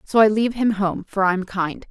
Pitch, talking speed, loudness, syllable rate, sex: 205 Hz, 285 wpm, -20 LUFS, 5.6 syllables/s, female